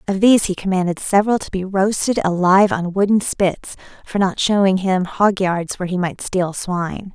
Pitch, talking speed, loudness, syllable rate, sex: 190 Hz, 195 wpm, -18 LUFS, 5.2 syllables/s, female